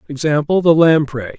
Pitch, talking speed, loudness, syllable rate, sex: 150 Hz, 130 wpm, -14 LUFS, 5.0 syllables/s, male